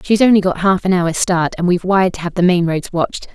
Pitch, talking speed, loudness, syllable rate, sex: 180 Hz, 285 wpm, -15 LUFS, 6.3 syllables/s, female